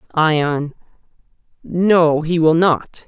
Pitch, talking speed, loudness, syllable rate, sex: 160 Hz, 95 wpm, -16 LUFS, 2.7 syllables/s, male